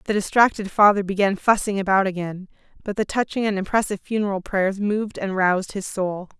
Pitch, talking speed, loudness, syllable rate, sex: 200 Hz, 180 wpm, -21 LUFS, 5.8 syllables/s, female